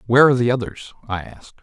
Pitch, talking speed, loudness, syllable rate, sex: 115 Hz, 220 wpm, -19 LUFS, 7.9 syllables/s, male